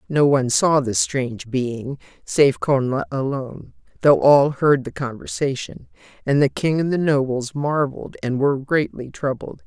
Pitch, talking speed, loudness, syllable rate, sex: 135 Hz, 155 wpm, -20 LUFS, 4.6 syllables/s, female